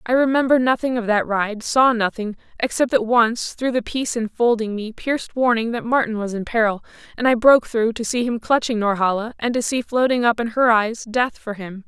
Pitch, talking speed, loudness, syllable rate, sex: 230 Hz, 210 wpm, -20 LUFS, 5.4 syllables/s, female